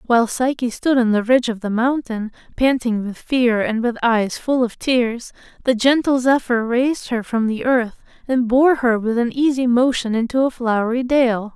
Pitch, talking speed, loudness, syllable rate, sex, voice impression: 240 Hz, 190 wpm, -18 LUFS, 4.7 syllables/s, female, feminine, adult-like, clear, intellectual, slightly calm, slightly sweet